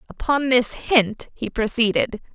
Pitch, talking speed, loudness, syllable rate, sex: 235 Hz, 130 wpm, -20 LUFS, 4.0 syllables/s, female